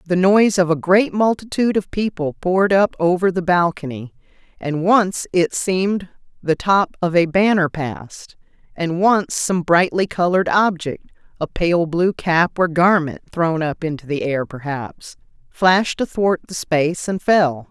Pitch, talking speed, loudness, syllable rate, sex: 175 Hz, 160 wpm, -18 LUFS, 4.4 syllables/s, female